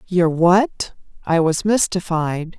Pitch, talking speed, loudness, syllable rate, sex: 175 Hz, 115 wpm, -18 LUFS, 3.3 syllables/s, female